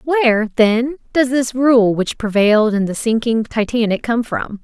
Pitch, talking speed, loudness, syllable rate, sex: 230 Hz, 170 wpm, -16 LUFS, 4.3 syllables/s, female